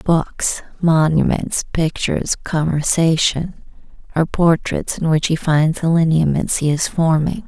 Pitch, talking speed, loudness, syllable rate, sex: 160 Hz, 120 wpm, -17 LUFS, 4.1 syllables/s, female